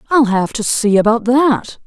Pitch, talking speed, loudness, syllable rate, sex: 235 Hz, 195 wpm, -14 LUFS, 4.4 syllables/s, female